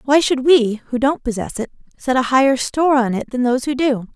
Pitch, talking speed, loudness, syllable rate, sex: 260 Hz, 245 wpm, -17 LUFS, 5.6 syllables/s, female